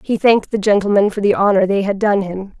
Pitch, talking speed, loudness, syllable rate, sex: 200 Hz, 255 wpm, -15 LUFS, 6.0 syllables/s, female